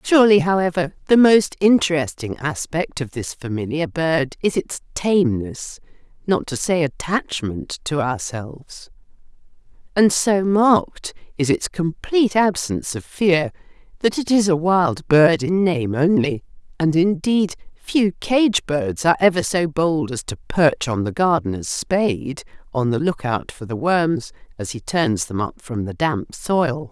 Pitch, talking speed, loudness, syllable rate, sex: 160 Hz, 155 wpm, -19 LUFS, 4.2 syllables/s, female